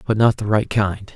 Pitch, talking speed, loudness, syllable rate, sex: 105 Hz, 260 wpm, -19 LUFS, 5.0 syllables/s, female